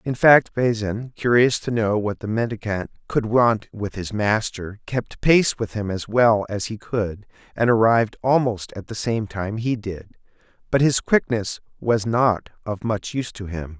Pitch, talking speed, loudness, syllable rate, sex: 110 Hz, 185 wpm, -21 LUFS, 4.3 syllables/s, male